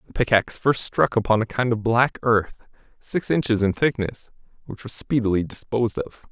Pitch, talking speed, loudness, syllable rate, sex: 115 Hz, 180 wpm, -22 LUFS, 5.2 syllables/s, male